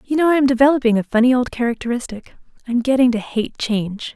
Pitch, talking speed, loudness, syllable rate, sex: 245 Hz, 215 wpm, -18 LUFS, 6.8 syllables/s, female